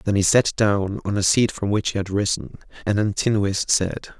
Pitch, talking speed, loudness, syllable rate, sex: 100 Hz, 215 wpm, -21 LUFS, 5.0 syllables/s, male